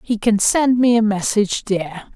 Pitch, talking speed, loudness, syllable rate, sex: 215 Hz, 195 wpm, -17 LUFS, 4.9 syllables/s, female